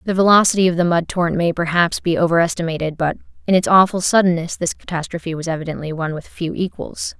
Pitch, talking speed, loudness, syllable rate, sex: 170 Hz, 190 wpm, -18 LUFS, 6.5 syllables/s, female